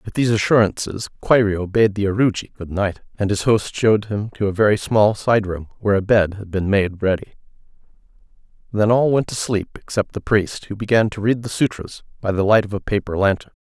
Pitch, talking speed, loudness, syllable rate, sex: 105 Hz, 210 wpm, -19 LUFS, 5.6 syllables/s, male